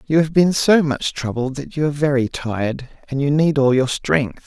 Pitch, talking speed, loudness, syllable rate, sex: 140 Hz, 230 wpm, -18 LUFS, 5.0 syllables/s, male